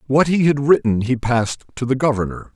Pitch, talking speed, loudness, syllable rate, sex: 130 Hz, 210 wpm, -18 LUFS, 5.7 syllables/s, male